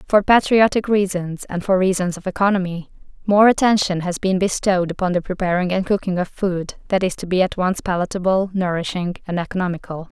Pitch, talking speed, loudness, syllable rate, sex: 185 Hz, 175 wpm, -19 LUFS, 5.8 syllables/s, female